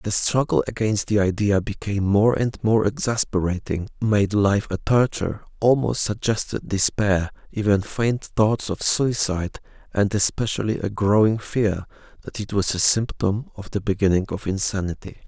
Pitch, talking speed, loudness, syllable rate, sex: 105 Hz, 145 wpm, -22 LUFS, 4.7 syllables/s, male